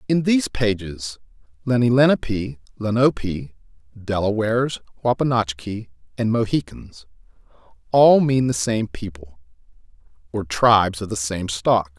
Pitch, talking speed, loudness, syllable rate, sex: 110 Hz, 105 wpm, -20 LUFS, 5.8 syllables/s, male